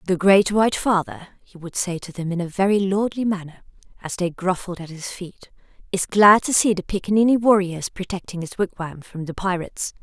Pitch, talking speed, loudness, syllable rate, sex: 185 Hz, 200 wpm, -21 LUFS, 5.5 syllables/s, female